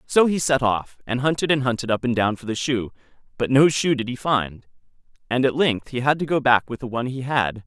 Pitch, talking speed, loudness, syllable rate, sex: 125 Hz, 260 wpm, -21 LUFS, 5.6 syllables/s, male